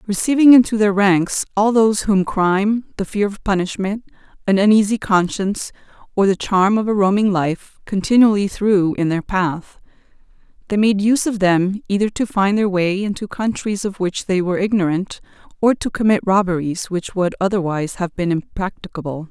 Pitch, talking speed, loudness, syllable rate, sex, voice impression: 195 Hz, 170 wpm, -18 LUFS, 5.2 syllables/s, female, feminine, adult-like, slightly clear, slightly intellectual, calm, slightly elegant